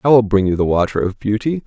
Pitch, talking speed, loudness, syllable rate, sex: 110 Hz, 290 wpm, -17 LUFS, 6.4 syllables/s, male